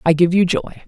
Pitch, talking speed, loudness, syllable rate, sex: 175 Hz, 275 wpm, -17 LUFS, 7.7 syllables/s, female